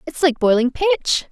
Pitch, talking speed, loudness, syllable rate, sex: 265 Hz, 185 wpm, -18 LUFS, 4.4 syllables/s, female